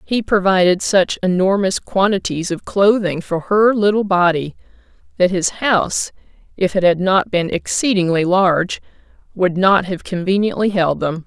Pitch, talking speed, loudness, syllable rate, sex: 190 Hz, 145 wpm, -16 LUFS, 4.6 syllables/s, female